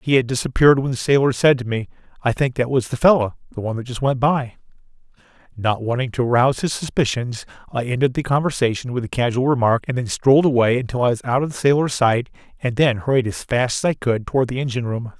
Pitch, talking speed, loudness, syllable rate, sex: 125 Hz, 230 wpm, -19 LUFS, 6.5 syllables/s, male